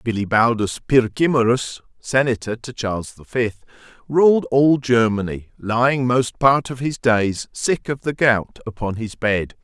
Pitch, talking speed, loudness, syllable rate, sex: 120 Hz, 145 wpm, -19 LUFS, 4.1 syllables/s, male